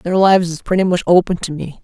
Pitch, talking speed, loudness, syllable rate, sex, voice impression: 175 Hz, 260 wpm, -15 LUFS, 6.3 syllables/s, female, feminine, middle-aged, tensed, clear, fluent, calm, reassuring, slightly elegant, slightly strict, sharp